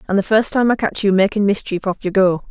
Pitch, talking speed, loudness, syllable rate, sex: 200 Hz, 285 wpm, -17 LUFS, 6.2 syllables/s, female